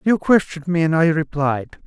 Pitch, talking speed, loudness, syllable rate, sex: 165 Hz, 195 wpm, -18 LUFS, 5.6 syllables/s, male